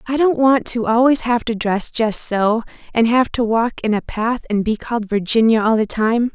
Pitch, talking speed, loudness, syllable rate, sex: 230 Hz, 225 wpm, -17 LUFS, 4.9 syllables/s, female